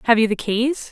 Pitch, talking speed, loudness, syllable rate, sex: 235 Hz, 265 wpm, -19 LUFS, 5.3 syllables/s, female